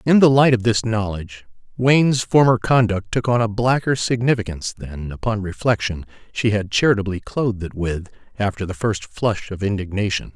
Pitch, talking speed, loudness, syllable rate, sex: 110 Hz, 170 wpm, -20 LUFS, 5.3 syllables/s, male